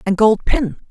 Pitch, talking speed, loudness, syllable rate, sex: 205 Hz, 200 wpm, -17 LUFS, 4.6 syllables/s, female